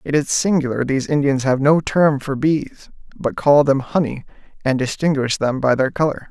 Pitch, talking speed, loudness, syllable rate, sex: 140 Hz, 190 wpm, -18 LUFS, 5.1 syllables/s, male